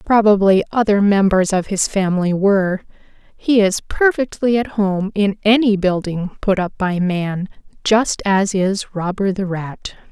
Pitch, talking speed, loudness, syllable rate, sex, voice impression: 200 Hz, 150 wpm, -17 LUFS, 4.2 syllables/s, female, very feminine, slightly adult-like, very thin, relaxed, weak, slightly dark, soft, clear, fluent, very cute, slightly cool, intellectual, very refreshing, sincere, calm, very friendly, very reassuring, very unique, elegant, slightly wild, very sweet, very kind, slightly strict, slightly intense, slightly modest, slightly light